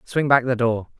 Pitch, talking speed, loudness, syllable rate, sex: 125 Hz, 240 wpm, -20 LUFS, 4.8 syllables/s, male